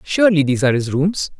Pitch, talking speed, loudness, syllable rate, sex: 155 Hz, 215 wpm, -16 LUFS, 7.3 syllables/s, male